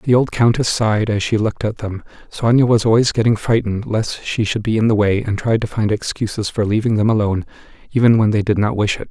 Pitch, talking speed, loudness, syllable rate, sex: 110 Hz, 245 wpm, -17 LUFS, 6.1 syllables/s, male